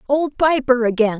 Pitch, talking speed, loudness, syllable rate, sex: 255 Hz, 150 wpm, -17 LUFS, 5.0 syllables/s, female